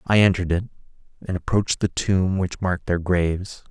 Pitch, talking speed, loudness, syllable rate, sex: 90 Hz, 180 wpm, -22 LUFS, 5.7 syllables/s, male